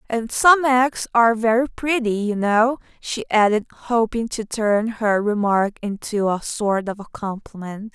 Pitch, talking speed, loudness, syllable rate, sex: 220 Hz, 160 wpm, -20 LUFS, 4.2 syllables/s, female